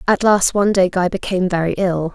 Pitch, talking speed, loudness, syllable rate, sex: 185 Hz, 225 wpm, -17 LUFS, 6.0 syllables/s, female